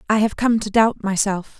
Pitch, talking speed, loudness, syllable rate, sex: 210 Hz, 225 wpm, -19 LUFS, 5.0 syllables/s, female